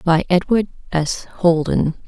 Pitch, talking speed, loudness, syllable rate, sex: 175 Hz, 115 wpm, -18 LUFS, 3.8 syllables/s, female